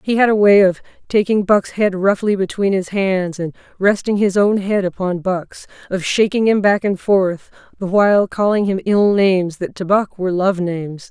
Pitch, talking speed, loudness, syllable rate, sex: 195 Hz, 200 wpm, -16 LUFS, 4.8 syllables/s, female